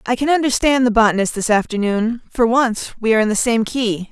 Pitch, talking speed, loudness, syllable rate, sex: 230 Hz, 220 wpm, -17 LUFS, 5.7 syllables/s, female